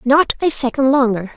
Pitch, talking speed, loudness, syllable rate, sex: 265 Hz, 175 wpm, -15 LUFS, 5.2 syllables/s, female